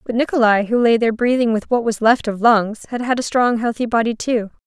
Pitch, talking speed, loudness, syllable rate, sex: 230 Hz, 245 wpm, -17 LUFS, 5.8 syllables/s, female